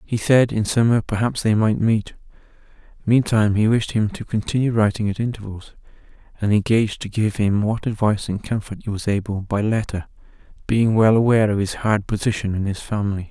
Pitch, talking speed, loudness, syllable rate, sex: 105 Hz, 185 wpm, -20 LUFS, 5.7 syllables/s, male